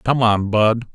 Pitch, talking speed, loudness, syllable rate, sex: 110 Hz, 190 wpm, -17 LUFS, 3.9 syllables/s, male